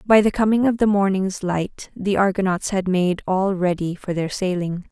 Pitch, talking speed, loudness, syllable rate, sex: 190 Hz, 195 wpm, -21 LUFS, 4.7 syllables/s, female